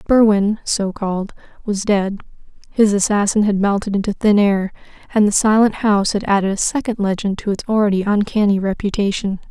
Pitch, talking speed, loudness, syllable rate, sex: 205 Hz, 150 wpm, -17 LUFS, 5.5 syllables/s, female